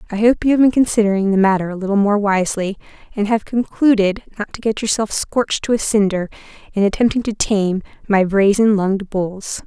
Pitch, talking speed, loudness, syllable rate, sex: 205 Hz, 190 wpm, -17 LUFS, 5.8 syllables/s, female